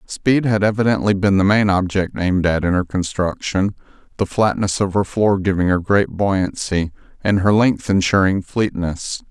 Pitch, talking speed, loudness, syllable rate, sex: 95 Hz, 170 wpm, -18 LUFS, 4.7 syllables/s, male